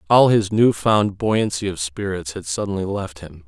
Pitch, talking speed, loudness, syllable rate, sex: 95 Hz, 190 wpm, -20 LUFS, 4.6 syllables/s, male